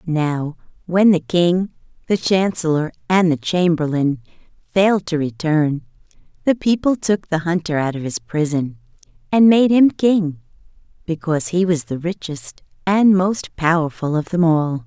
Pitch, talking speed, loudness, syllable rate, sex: 170 Hz, 145 wpm, -18 LUFS, 4.3 syllables/s, female